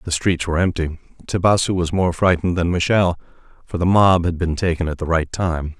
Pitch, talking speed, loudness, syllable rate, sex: 85 Hz, 205 wpm, -19 LUFS, 5.9 syllables/s, male